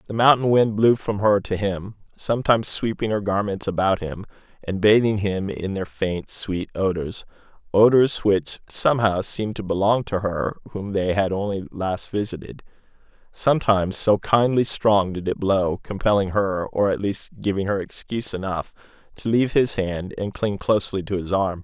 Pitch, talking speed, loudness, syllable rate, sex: 100 Hz, 170 wpm, -22 LUFS, 4.9 syllables/s, male